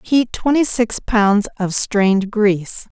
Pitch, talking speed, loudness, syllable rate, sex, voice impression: 215 Hz, 140 wpm, -17 LUFS, 3.7 syllables/s, female, very feminine, very middle-aged, very thin, tensed, powerful, bright, slightly soft, very clear, very fluent, cool, intellectual, very refreshing, sincere, calm, very friendly, reassuring, unique, slightly elegant, slightly wild, sweet, lively, kind, slightly intense, slightly modest